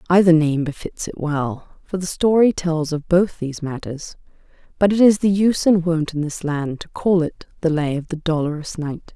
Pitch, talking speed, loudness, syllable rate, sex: 165 Hz, 210 wpm, -20 LUFS, 5.0 syllables/s, female